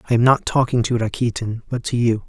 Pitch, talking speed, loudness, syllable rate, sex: 120 Hz, 235 wpm, -19 LUFS, 6.0 syllables/s, male